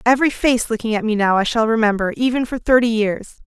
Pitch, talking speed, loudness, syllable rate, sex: 230 Hz, 225 wpm, -17 LUFS, 6.2 syllables/s, female